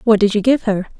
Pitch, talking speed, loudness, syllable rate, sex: 215 Hz, 300 wpm, -16 LUFS, 6.3 syllables/s, female